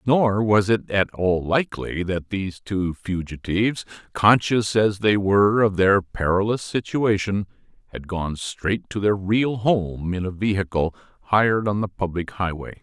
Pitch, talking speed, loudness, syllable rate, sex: 100 Hz, 155 wpm, -22 LUFS, 4.4 syllables/s, male